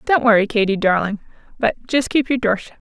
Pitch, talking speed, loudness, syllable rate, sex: 225 Hz, 210 wpm, -18 LUFS, 5.6 syllables/s, female